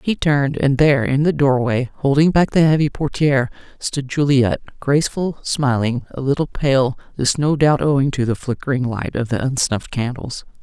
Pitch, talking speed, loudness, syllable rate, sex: 140 Hz, 175 wpm, -18 LUFS, 5.2 syllables/s, female